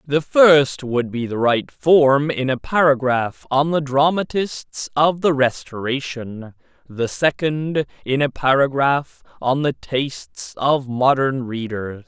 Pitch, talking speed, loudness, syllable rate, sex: 135 Hz, 135 wpm, -19 LUFS, 3.6 syllables/s, male